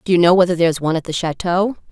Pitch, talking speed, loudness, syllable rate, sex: 175 Hz, 315 wpm, -17 LUFS, 8.2 syllables/s, female